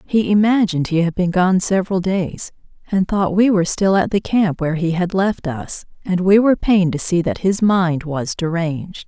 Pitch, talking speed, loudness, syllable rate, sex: 185 Hz, 210 wpm, -17 LUFS, 5.1 syllables/s, female